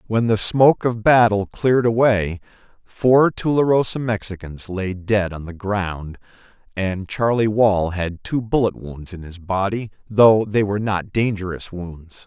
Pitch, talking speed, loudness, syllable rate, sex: 105 Hz, 150 wpm, -19 LUFS, 4.2 syllables/s, male